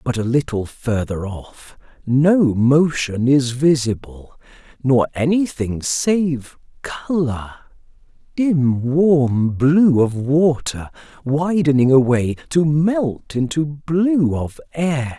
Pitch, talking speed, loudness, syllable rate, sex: 140 Hz, 105 wpm, -18 LUFS, 3.0 syllables/s, male